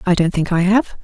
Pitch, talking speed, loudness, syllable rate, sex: 185 Hz, 290 wpm, -16 LUFS, 5.7 syllables/s, female